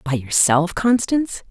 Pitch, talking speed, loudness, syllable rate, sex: 190 Hz, 120 wpm, -18 LUFS, 4.4 syllables/s, female